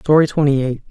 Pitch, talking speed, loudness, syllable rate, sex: 145 Hz, 200 wpm, -16 LUFS, 6.2 syllables/s, male